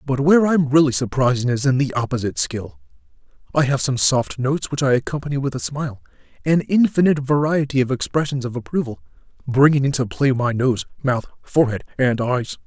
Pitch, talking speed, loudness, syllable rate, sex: 130 Hz, 170 wpm, -19 LUFS, 5.9 syllables/s, male